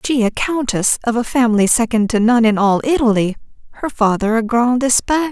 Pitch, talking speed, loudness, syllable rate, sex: 235 Hz, 190 wpm, -15 LUFS, 5.7 syllables/s, female